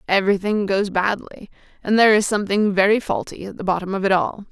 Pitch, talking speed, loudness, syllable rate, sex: 200 Hz, 215 wpm, -19 LUFS, 6.6 syllables/s, female